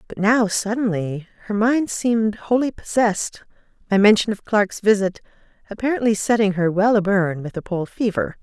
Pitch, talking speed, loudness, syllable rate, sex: 210 Hz, 165 wpm, -20 LUFS, 5.1 syllables/s, female